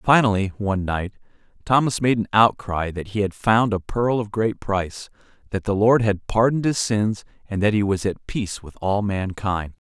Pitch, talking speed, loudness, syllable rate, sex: 105 Hz, 195 wpm, -22 LUFS, 4.9 syllables/s, male